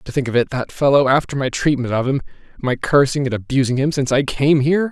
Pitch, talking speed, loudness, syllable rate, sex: 135 Hz, 220 wpm, -18 LUFS, 6.4 syllables/s, male